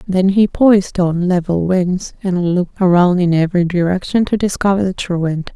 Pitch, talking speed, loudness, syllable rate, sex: 185 Hz, 175 wpm, -15 LUFS, 5.0 syllables/s, female